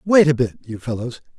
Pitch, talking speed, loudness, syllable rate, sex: 135 Hz, 215 wpm, -19 LUFS, 5.6 syllables/s, male